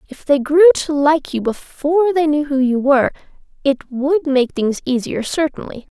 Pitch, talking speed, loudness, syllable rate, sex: 290 Hz, 180 wpm, -16 LUFS, 4.8 syllables/s, female